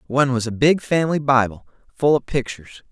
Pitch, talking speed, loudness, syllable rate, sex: 130 Hz, 185 wpm, -19 LUFS, 6.2 syllables/s, male